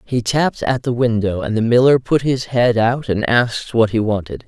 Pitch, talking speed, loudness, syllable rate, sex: 115 Hz, 230 wpm, -17 LUFS, 5.1 syllables/s, male